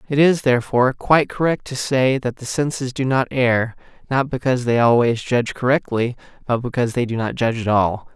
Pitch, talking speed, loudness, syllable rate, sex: 125 Hz, 200 wpm, -19 LUFS, 5.8 syllables/s, male